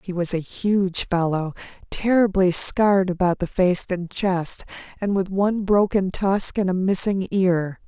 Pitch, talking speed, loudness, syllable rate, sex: 190 Hz, 160 wpm, -21 LUFS, 4.2 syllables/s, female